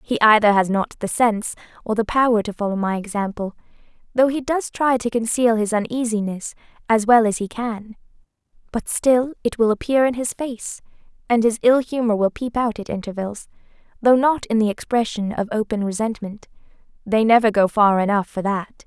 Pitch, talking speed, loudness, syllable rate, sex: 225 Hz, 180 wpm, -20 LUFS, 5.2 syllables/s, female